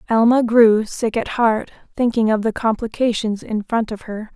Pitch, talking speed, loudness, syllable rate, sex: 225 Hz, 180 wpm, -18 LUFS, 4.6 syllables/s, female